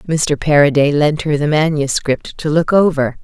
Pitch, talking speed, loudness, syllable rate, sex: 150 Hz, 165 wpm, -14 LUFS, 4.6 syllables/s, female